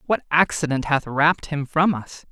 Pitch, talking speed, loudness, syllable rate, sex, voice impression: 150 Hz, 180 wpm, -21 LUFS, 4.3 syllables/s, male, masculine, very adult-like, thick, tensed, powerful, dark, hard, slightly clear, fluent, cool, intellectual, very refreshing, sincere, very calm, slightly mature, friendly, reassuring, unique, slightly elegant, slightly wild, slightly sweet, slightly lively, kind, modest